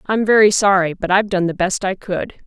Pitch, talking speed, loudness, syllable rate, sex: 195 Hz, 245 wpm, -16 LUFS, 5.8 syllables/s, female